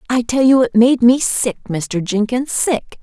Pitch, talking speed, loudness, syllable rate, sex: 240 Hz, 200 wpm, -15 LUFS, 4.0 syllables/s, female